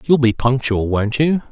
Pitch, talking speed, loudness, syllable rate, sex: 125 Hz, 200 wpm, -17 LUFS, 4.4 syllables/s, male